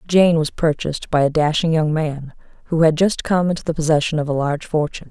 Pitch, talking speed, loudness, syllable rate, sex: 155 Hz, 225 wpm, -18 LUFS, 6.1 syllables/s, female